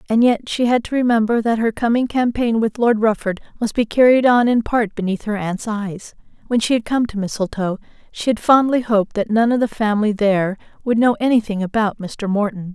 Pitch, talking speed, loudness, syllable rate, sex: 220 Hz, 210 wpm, -18 LUFS, 5.5 syllables/s, female